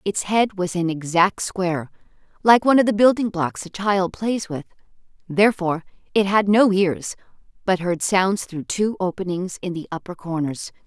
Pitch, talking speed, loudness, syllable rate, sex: 190 Hz, 170 wpm, -21 LUFS, 4.9 syllables/s, female